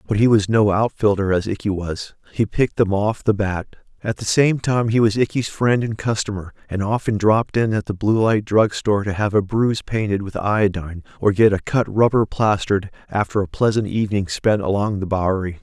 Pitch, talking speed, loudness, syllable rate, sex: 105 Hz, 210 wpm, -19 LUFS, 5.5 syllables/s, male